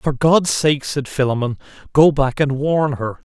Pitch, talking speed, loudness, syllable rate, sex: 140 Hz, 180 wpm, -17 LUFS, 4.2 syllables/s, male